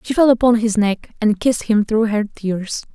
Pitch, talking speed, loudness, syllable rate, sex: 220 Hz, 225 wpm, -17 LUFS, 4.8 syllables/s, female